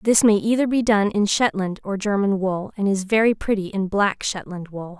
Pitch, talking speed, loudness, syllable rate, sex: 200 Hz, 215 wpm, -21 LUFS, 4.9 syllables/s, female